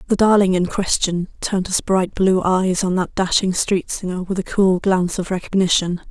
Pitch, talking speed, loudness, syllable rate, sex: 185 Hz, 195 wpm, -18 LUFS, 5.1 syllables/s, female